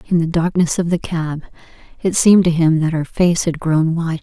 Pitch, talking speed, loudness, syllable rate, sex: 165 Hz, 225 wpm, -16 LUFS, 5.4 syllables/s, female